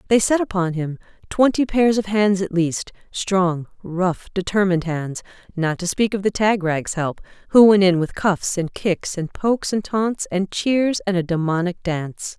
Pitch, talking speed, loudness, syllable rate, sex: 190 Hz, 185 wpm, -20 LUFS, 4.5 syllables/s, female